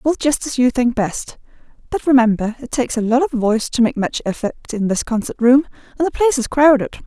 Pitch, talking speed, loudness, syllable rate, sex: 250 Hz, 230 wpm, -17 LUFS, 5.8 syllables/s, female